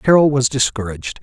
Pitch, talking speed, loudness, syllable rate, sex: 125 Hz, 145 wpm, -16 LUFS, 5.9 syllables/s, male